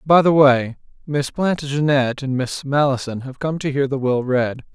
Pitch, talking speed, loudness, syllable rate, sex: 135 Hz, 190 wpm, -19 LUFS, 4.7 syllables/s, male